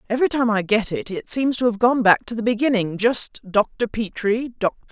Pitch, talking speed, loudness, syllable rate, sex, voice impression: 225 Hz, 195 wpm, -21 LUFS, 5.1 syllables/s, female, feminine, very adult-like, slightly clear, calm, slightly strict